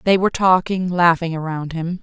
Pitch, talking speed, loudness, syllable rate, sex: 175 Hz, 180 wpm, -18 LUFS, 5.2 syllables/s, female